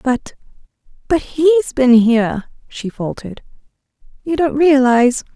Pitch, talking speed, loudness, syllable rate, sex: 265 Hz, 100 wpm, -15 LUFS, 4.3 syllables/s, female